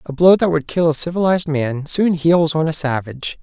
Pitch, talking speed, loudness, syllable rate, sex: 160 Hz, 230 wpm, -17 LUFS, 5.4 syllables/s, male